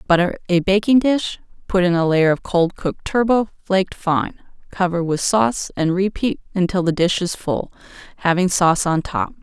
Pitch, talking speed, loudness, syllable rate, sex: 185 Hz, 180 wpm, -19 LUFS, 5.0 syllables/s, female